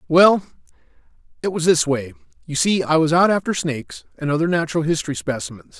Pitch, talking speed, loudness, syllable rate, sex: 160 Hz, 175 wpm, -19 LUFS, 6.2 syllables/s, male